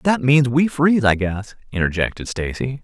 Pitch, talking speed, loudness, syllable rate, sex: 125 Hz, 170 wpm, -18 LUFS, 4.9 syllables/s, male